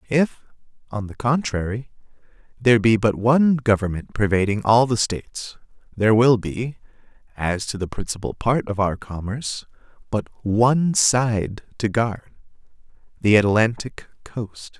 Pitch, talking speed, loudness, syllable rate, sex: 110 Hz, 125 wpm, -21 LUFS, 4.4 syllables/s, male